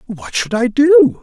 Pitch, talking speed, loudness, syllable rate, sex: 220 Hz, 195 wpm, -14 LUFS, 3.7 syllables/s, male